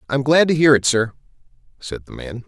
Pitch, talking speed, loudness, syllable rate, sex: 135 Hz, 220 wpm, -16 LUFS, 5.5 syllables/s, male